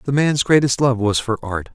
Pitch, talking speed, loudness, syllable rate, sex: 120 Hz, 240 wpm, -18 LUFS, 5.0 syllables/s, male